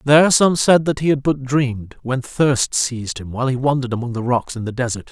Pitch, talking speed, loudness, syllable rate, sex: 130 Hz, 245 wpm, -18 LUFS, 5.9 syllables/s, male